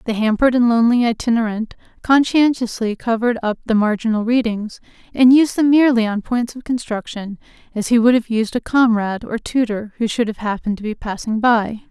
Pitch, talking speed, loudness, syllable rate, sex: 230 Hz, 180 wpm, -17 LUFS, 5.7 syllables/s, female